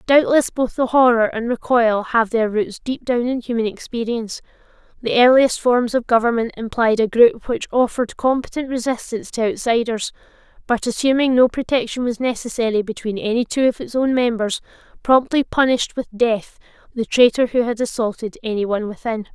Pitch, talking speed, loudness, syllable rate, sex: 235 Hz, 160 wpm, -19 LUFS, 5.3 syllables/s, female